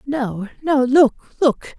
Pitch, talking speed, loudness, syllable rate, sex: 265 Hz, 100 wpm, -18 LUFS, 3.0 syllables/s, female